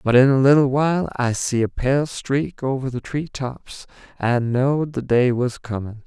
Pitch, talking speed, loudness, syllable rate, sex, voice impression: 130 Hz, 190 wpm, -20 LUFS, 4.4 syllables/s, male, masculine, adult-like, tensed, powerful, bright, clear, cool, intellectual, slightly sincere, friendly, slightly wild, lively, slightly kind